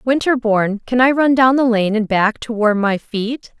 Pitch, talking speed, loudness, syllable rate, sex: 230 Hz, 215 wpm, -16 LUFS, 4.7 syllables/s, female